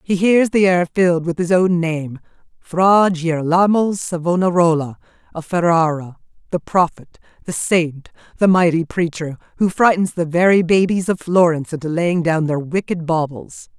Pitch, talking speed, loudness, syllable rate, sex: 170 Hz, 145 wpm, -17 LUFS, 4.7 syllables/s, female